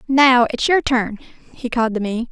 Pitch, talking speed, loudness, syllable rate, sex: 240 Hz, 205 wpm, -17 LUFS, 5.2 syllables/s, female